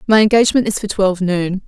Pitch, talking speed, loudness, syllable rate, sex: 200 Hz, 215 wpm, -15 LUFS, 6.8 syllables/s, female